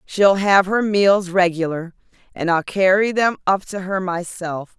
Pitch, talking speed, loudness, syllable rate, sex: 185 Hz, 165 wpm, -18 LUFS, 4.1 syllables/s, female